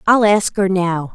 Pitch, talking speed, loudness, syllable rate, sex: 195 Hz, 210 wpm, -16 LUFS, 4.0 syllables/s, female